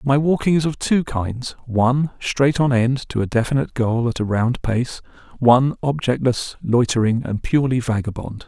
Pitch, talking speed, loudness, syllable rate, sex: 125 Hz, 170 wpm, -19 LUFS, 5.0 syllables/s, male